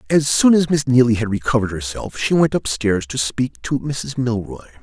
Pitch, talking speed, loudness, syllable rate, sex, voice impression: 120 Hz, 200 wpm, -18 LUFS, 5.2 syllables/s, male, masculine, middle-aged, tensed, powerful, muffled, raspy, mature, friendly, wild, lively, slightly strict